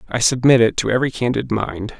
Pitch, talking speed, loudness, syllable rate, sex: 120 Hz, 210 wpm, -17 LUFS, 6.2 syllables/s, male